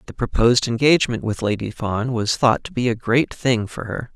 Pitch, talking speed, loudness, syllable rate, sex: 120 Hz, 215 wpm, -20 LUFS, 5.3 syllables/s, male